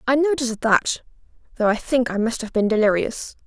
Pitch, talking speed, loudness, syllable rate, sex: 235 Hz, 190 wpm, -21 LUFS, 5.5 syllables/s, female